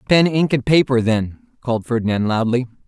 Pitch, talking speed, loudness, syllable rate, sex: 125 Hz, 165 wpm, -18 LUFS, 5.2 syllables/s, male